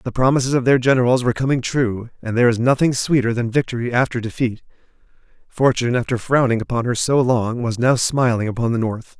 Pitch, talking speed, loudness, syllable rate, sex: 120 Hz, 195 wpm, -18 LUFS, 6.2 syllables/s, male